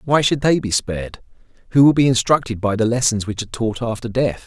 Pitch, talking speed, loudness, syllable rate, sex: 120 Hz, 230 wpm, -18 LUFS, 6.0 syllables/s, male